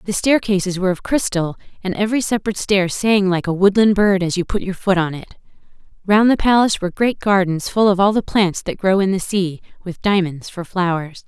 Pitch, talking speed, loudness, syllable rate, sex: 190 Hz, 220 wpm, -17 LUFS, 5.8 syllables/s, female